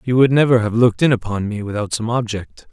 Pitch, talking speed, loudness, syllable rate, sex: 115 Hz, 245 wpm, -17 LUFS, 6.2 syllables/s, male